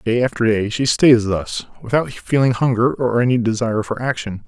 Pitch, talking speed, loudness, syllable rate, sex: 120 Hz, 190 wpm, -18 LUFS, 5.3 syllables/s, male